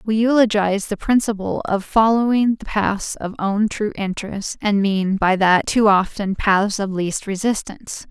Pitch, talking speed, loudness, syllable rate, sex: 205 Hz, 165 wpm, -19 LUFS, 4.5 syllables/s, female